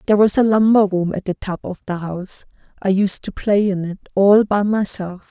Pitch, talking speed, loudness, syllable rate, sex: 195 Hz, 225 wpm, -18 LUFS, 5.3 syllables/s, female